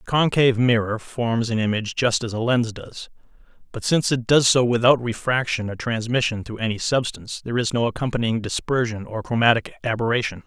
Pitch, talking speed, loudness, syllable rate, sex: 115 Hz, 180 wpm, -21 LUFS, 5.9 syllables/s, male